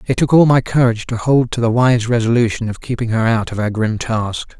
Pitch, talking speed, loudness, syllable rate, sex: 115 Hz, 250 wpm, -16 LUFS, 5.7 syllables/s, male